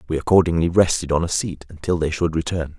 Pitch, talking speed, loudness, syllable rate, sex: 85 Hz, 215 wpm, -20 LUFS, 6.2 syllables/s, male